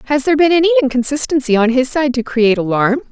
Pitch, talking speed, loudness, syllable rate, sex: 270 Hz, 210 wpm, -14 LUFS, 7.1 syllables/s, female